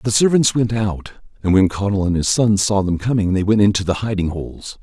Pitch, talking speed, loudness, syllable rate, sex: 100 Hz, 235 wpm, -17 LUFS, 5.5 syllables/s, male